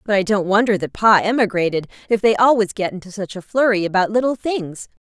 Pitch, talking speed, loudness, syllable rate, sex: 205 Hz, 210 wpm, -18 LUFS, 5.9 syllables/s, female